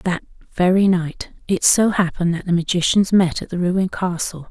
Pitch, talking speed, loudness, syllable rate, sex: 180 Hz, 185 wpm, -18 LUFS, 5.2 syllables/s, female